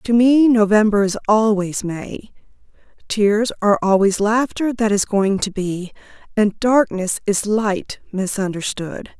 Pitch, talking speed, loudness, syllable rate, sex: 210 Hz, 130 wpm, -18 LUFS, 4.0 syllables/s, female